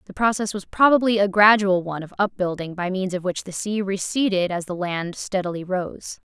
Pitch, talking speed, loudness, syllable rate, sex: 190 Hz, 210 wpm, -22 LUFS, 5.3 syllables/s, female